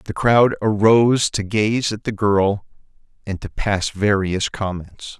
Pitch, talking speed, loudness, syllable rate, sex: 105 Hz, 150 wpm, -19 LUFS, 3.8 syllables/s, male